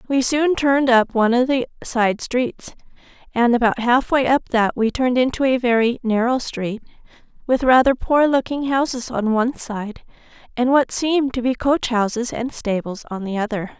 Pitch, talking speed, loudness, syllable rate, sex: 245 Hz, 180 wpm, -19 LUFS, 4.9 syllables/s, female